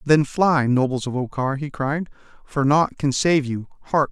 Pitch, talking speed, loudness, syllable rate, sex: 140 Hz, 190 wpm, -21 LUFS, 4.4 syllables/s, male